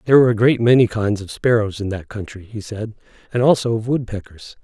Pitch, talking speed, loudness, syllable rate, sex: 110 Hz, 220 wpm, -18 LUFS, 6.2 syllables/s, male